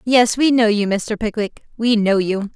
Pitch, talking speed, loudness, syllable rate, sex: 220 Hz, 210 wpm, -17 LUFS, 4.4 syllables/s, female